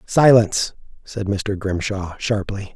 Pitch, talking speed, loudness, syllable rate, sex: 100 Hz, 110 wpm, -20 LUFS, 3.9 syllables/s, male